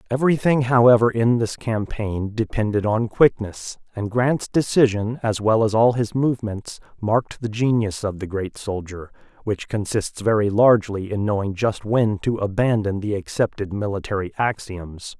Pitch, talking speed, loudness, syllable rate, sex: 110 Hz, 150 wpm, -21 LUFS, 4.7 syllables/s, male